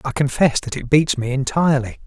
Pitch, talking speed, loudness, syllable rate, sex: 135 Hz, 205 wpm, -18 LUFS, 5.7 syllables/s, male